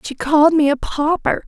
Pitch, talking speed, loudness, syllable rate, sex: 290 Hz, 205 wpm, -16 LUFS, 5.1 syllables/s, female